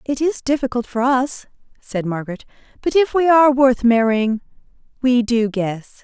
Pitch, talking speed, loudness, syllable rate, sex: 250 Hz, 160 wpm, -18 LUFS, 4.9 syllables/s, female